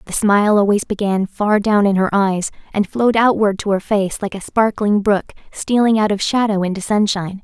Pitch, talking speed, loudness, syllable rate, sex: 205 Hz, 200 wpm, -16 LUFS, 5.3 syllables/s, female